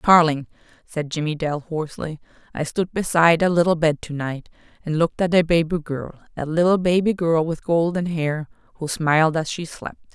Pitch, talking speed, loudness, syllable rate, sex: 165 Hz, 175 wpm, -21 LUFS, 5.3 syllables/s, female